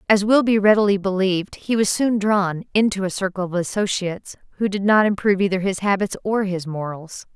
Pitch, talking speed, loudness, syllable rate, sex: 195 Hz, 195 wpm, -20 LUFS, 5.7 syllables/s, female